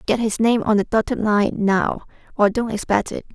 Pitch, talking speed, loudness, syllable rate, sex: 215 Hz, 215 wpm, -19 LUFS, 5.0 syllables/s, female